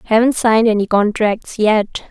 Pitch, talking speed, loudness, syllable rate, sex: 220 Hz, 140 wpm, -15 LUFS, 4.7 syllables/s, female